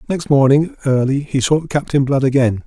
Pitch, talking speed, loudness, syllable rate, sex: 140 Hz, 180 wpm, -16 LUFS, 5.0 syllables/s, male